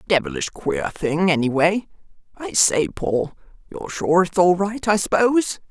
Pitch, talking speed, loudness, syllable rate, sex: 175 Hz, 145 wpm, -20 LUFS, 4.6 syllables/s, female